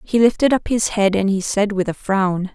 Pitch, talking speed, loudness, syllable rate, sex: 205 Hz, 260 wpm, -18 LUFS, 4.9 syllables/s, female